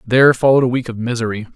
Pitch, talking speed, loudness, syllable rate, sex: 120 Hz, 230 wpm, -15 LUFS, 7.9 syllables/s, male